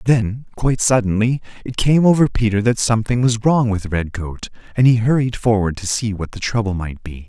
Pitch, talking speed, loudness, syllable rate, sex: 110 Hz, 200 wpm, -18 LUFS, 5.4 syllables/s, male